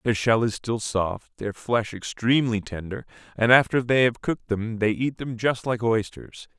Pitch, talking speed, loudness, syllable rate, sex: 115 Hz, 190 wpm, -24 LUFS, 4.7 syllables/s, male